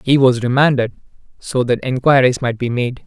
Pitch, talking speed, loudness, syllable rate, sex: 125 Hz, 175 wpm, -16 LUFS, 5.2 syllables/s, male